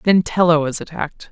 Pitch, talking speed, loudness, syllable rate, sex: 165 Hz, 180 wpm, -18 LUFS, 5.9 syllables/s, female